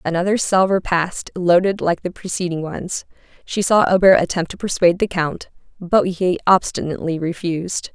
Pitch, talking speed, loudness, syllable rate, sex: 180 Hz, 150 wpm, -18 LUFS, 5.2 syllables/s, female